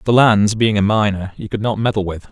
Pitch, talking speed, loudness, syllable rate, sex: 105 Hz, 260 wpm, -16 LUFS, 5.6 syllables/s, male